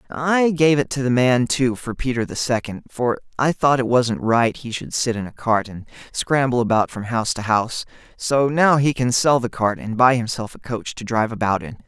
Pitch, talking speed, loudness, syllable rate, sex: 125 Hz, 230 wpm, -20 LUFS, 5.1 syllables/s, male